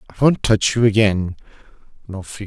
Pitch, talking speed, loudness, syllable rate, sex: 105 Hz, 145 wpm, -17 LUFS, 5.8 syllables/s, male